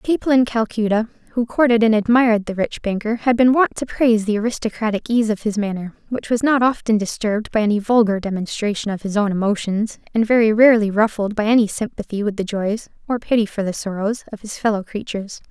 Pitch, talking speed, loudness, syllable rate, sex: 220 Hz, 205 wpm, -19 LUFS, 6.1 syllables/s, female